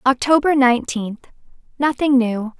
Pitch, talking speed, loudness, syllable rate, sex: 255 Hz, 70 wpm, -17 LUFS, 4.5 syllables/s, female